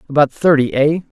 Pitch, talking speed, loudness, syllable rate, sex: 145 Hz, 150 wpm, -15 LUFS, 6.2 syllables/s, male